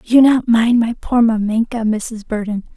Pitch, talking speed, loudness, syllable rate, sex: 225 Hz, 175 wpm, -16 LUFS, 4.5 syllables/s, female